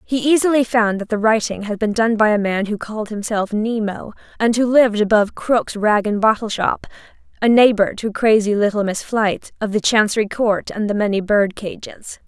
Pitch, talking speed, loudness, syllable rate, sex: 215 Hz, 200 wpm, -17 LUFS, 5.3 syllables/s, female